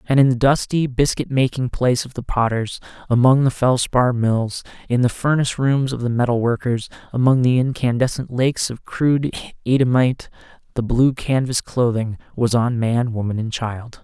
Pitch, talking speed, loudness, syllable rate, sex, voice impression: 125 Hz, 165 wpm, -19 LUFS, 5.0 syllables/s, male, masculine, adult-like, tensed, bright, clear, fluent, intellectual, friendly, reassuring, lively, kind